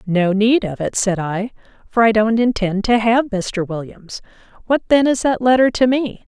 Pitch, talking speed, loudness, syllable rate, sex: 220 Hz, 200 wpm, -17 LUFS, 4.5 syllables/s, female